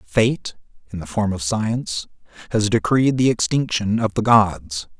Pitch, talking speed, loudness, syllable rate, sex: 110 Hz, 155 wpm, -20 LUFS, 4.2 syllables/s, male